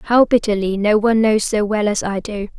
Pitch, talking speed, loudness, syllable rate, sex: 210 Hz, 230 wpm, -17 LUFS, 5.2 syllables/s, female